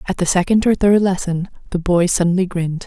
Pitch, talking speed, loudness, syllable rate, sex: 180 Hz, 210 wpm, -17 LUFS, 6.1 syllables/s, female